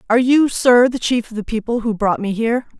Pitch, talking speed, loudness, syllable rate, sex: 235 Hz, 255 wpm, -17 LUFS, 5.9 syllables/s, female